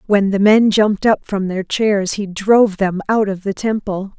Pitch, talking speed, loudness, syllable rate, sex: 200 Hz, 215 wpm, -16 LUFS, 4.6 syllables/s, female